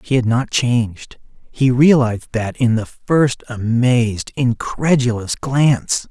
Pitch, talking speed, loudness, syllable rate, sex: 125 Hz, 130 wpm, -17 LUFS, 3.9 syllables/s, male